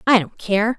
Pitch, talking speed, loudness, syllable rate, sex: 215 Hz, 230 wpm, -19 LUFS, 4.6 syllables/s, female